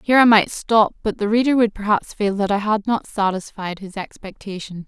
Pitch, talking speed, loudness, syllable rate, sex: 205 Hz, 210 wpm, -19 LUFS, 5.3 syllables/s, female